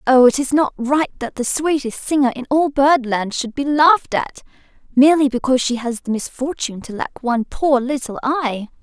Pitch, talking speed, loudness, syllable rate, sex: 265 Hz, 190 wpm, -18 LUFS, 5.1 syllables/s, female